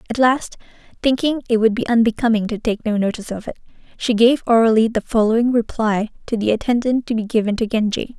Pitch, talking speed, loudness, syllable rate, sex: 225 Hz, 200 wpm, -18 LUFS, 6.1 syllables/s, female